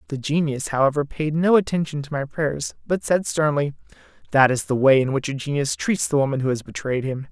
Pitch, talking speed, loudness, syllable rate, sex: 145 Hz, 220 wpm, -21 LUFS, 5.6 syllables/s, male